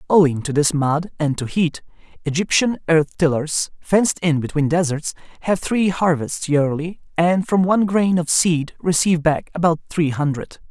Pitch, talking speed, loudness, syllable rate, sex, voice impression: 165 Hz, 165 wpm, -19 LUFS, 4.7 syllables/s, male, masculine, adult-like, tensed, powerful, slightly bright, clear, fluent, intellectual, refreshing, friendly, lively